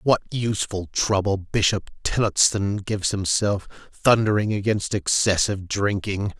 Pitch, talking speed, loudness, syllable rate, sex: 100 Hz, 105 wpm, -22 LUFS, 4.5 syllables/s, male